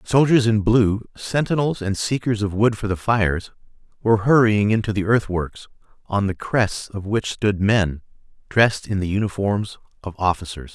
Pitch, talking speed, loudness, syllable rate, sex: 105 Hz, 160 wpm, -20 LUFS, 4.8 syllables/s, male